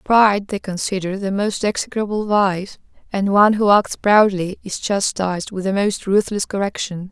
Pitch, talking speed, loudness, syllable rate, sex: 200 Hz, 160 wpm, -18 LUFS, 4.8 syllables/s, female